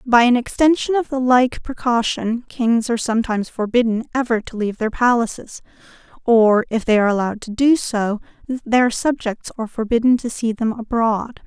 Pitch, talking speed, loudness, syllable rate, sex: 235 Hz, 165 wpm, -18 LUFS, 5.3 syllables/s, female